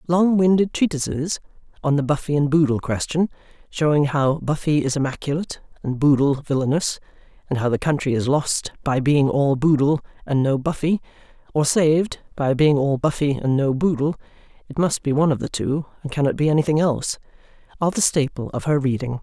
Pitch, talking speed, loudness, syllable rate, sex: 145 Hz, 180 wpm, -21 LUFS, 4.7 syllables/s, female